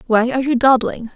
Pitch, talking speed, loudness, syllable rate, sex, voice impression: 250 Hz, 205 wpm, -16 LUFS, 6.1 syllables/s, female, feminine, adult-like, slightly tensed, slightly bright, clear, raspy, intellectual, calm, friendly, reassuring, elegant, slightly lively, slightly sharp